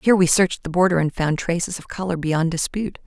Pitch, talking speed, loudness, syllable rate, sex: 175 Hz, 235 wpm, -21 LUFS, 6.5 syllables/s, female